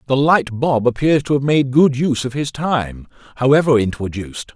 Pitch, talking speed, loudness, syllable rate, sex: 130 Hz, 185 wpm, -17 LUFS, 5.5 syllables/s, male